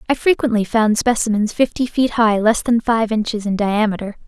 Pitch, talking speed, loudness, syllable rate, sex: 220 Hz, 180 wpm, -17 LUFS, 5.2 syllables/s, female